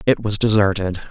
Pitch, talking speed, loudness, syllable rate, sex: 100 Hz, 165 wpm, -18 LUFS, 5.6 syllables/s, male